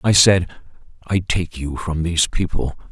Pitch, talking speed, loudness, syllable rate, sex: 85 Hz, 165 wpm, -19 LUFS, 4.6 syllables/s, male